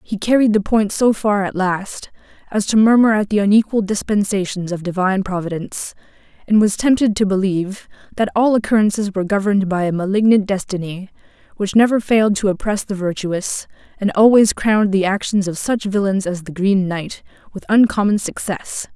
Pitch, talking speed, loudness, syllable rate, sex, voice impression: 200 Hz, 170 wpm, -17 LUFS, 5.3 syllables/s, female, very feminine, very adult-like, thin, tensed, slightly powerful, dark, hard, clear, very fluent, slightly raspy, cool, very intellectual, refreshing, slightly sincere, calm, very friendly, reassuring, unique, elegant, wild, slightly sweet, lively, strict, slightly intense, slightly sharp, light